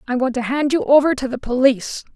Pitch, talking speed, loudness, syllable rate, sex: 260 Hz, 250 wpm, -18 LUFS, 6.3 syllables/s, female